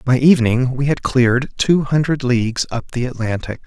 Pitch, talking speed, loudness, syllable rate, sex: 130 Hz, 180 wpm, -17 LUFS, 5.3 syllables/s, male